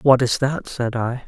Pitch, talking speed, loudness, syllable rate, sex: 125 Hz, 235 wpm, -21 LUFS, 4.3 syllables/s, male